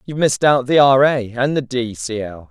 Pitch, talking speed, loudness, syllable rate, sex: 125 Hz, 265 wpm, -16 LUFS, 5.4 syllables/s, male